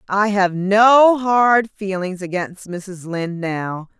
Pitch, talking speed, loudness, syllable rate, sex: 195 Hz, 135 wpm, -17 LUFS, 3.2 syllables/s, female